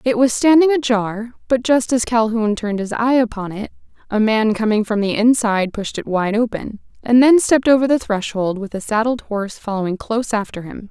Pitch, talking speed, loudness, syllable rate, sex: 225 Hz, 205 wpm, -17 LUFS, 5.5 syllables/s, female